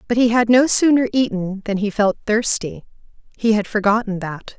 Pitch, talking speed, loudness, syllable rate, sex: 215 Hz, 185 wpm, -18 LUFS, 5.1 syllables/s, female